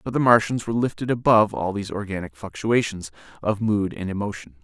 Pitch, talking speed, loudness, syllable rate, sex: 105 Hz, 180 wpm, -23 LUFS, 6.2 syllables/s, male